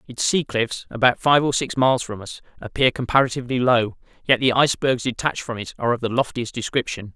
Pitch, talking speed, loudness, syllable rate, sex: 125 Hz, 200 wpm, -21 LUFS, 6.2 syllables/s, male